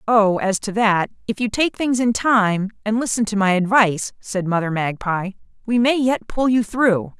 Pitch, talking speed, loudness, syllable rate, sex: 215 Hz, 200 wpm, -19 LUFS, 4.6 syllables/s, female